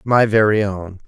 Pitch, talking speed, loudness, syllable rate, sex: 105 Hz, 170 wpm, -16 LUFS, 4.3 syllables/s, male